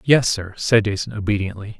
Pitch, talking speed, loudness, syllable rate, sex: 105 Hz, 170 wpm, -20 LUFS, 5.4 syllables/s, male